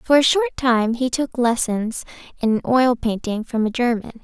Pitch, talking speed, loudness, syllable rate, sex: 240 Hz, 185 wpm, -20 LUFS, 4.4 syllables/s, female